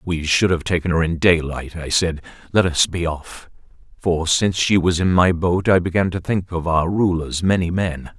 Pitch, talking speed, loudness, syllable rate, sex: 85 Hz, 215 wpm, -19 LUFS, 4.8 syllables/s, male